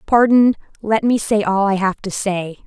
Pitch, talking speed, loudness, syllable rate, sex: 210 Hz, 200 wpm, -17 LUFS, 4.6 syllables/s, female